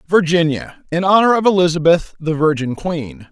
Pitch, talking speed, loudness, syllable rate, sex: 170 Hz, 125 wpm, -16 LUFS, 4.9 syllables/s, male